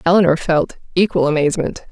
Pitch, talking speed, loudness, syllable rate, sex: 165 Hz, 125 wpm, -17 LUFS, 6.1 syllables/s, female